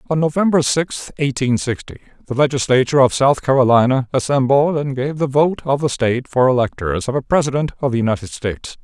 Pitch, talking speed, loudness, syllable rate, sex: 135 Hz, 185 wpm, -17 LUFS, 6.0 syllables/s, male